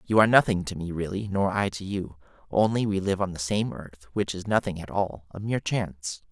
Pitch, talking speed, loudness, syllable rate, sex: 95 Hz, 230 wpm, -26 LUFS, 5.6 syllables/s, male